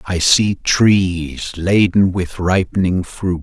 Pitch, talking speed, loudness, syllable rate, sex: 90 Hz, 125 wpm, -16 LUFS, 3.0 syllables/s, male